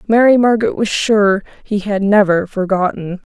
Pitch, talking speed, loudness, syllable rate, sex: 205 Hz, 145 wpm, -14 LUFS, 4.8 syllables/s, female